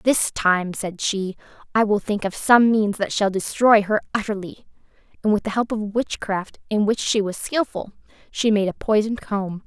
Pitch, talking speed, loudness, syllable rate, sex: 210 Hz, 190 wpm, -21 LUFS, 4.7 syllables/s, female